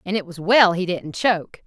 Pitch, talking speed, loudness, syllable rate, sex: 190 Hz, 255 wpm, -19 LUFS, 5.1 syllables/s, female